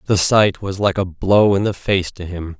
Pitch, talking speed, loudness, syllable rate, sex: 95 Hz, 255 wpm, -17 LUFS, 4.5 syllables/s, male